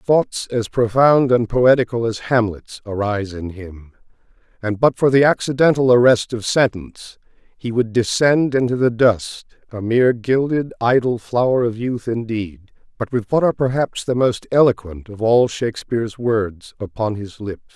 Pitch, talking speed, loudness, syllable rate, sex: 115 Hz, 160 wpm, -18 LUFS, 4.7 syllables/s, male